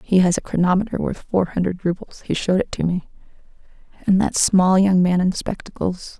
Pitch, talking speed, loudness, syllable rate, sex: 185 Hz, 195 wpm, -20 LUFS, 5.5 syllables/s, female